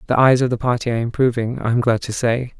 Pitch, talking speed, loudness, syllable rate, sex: 120 Hz, 280 wpm, -18 LUFS, 6.7 syllables/s, male